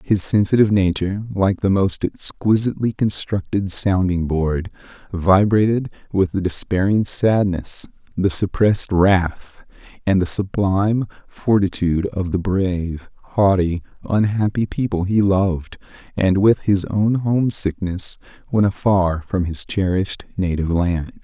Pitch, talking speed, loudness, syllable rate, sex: 95 Hz, 120 wpm, -19 LUFS, 4.4 syllables/s, male